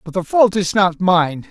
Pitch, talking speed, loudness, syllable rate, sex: 185 Hz, 240 wpm, -16 LUFS, 4.3 syllables/s, male